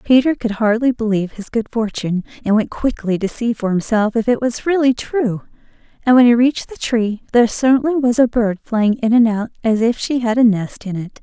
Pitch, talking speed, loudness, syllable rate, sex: 230 Hz, 225 wpm, -17 LUFS, 5.5 syllables/s, female